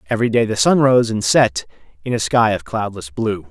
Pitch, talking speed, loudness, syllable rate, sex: 110 Hz, 225 wpm, -17 LUFS, 5.5 syllables/s, male